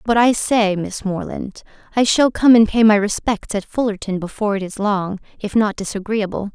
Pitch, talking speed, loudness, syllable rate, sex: 210 Hz, 190 wpm, -18 LUFS, 5.1 syllables/s, female